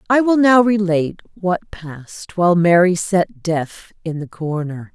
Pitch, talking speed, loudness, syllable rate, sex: 180 Hz, 160 wpm, -17 LUFS, 4.2 syllables/s, female